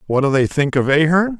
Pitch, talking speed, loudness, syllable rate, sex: 155 Hz, 260 wpm, -16 LUFS, 5.7 syllables/s, male